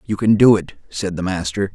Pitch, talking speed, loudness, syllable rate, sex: 95 Hz, 240 wpm, -17 LUFS, 5.3 syllables/s, male